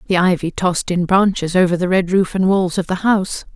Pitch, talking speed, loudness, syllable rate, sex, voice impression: 185 Hz, 235 wpm, -17 LUFS, 5.8 syllables/s, female, feminine, adult-like, slightly muffled, calm, slightly reassuring